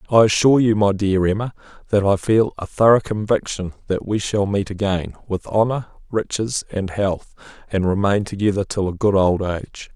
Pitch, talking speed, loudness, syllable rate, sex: 100 Hz, 180 wpm, -20 LUFS, 5.2 syllables/s, male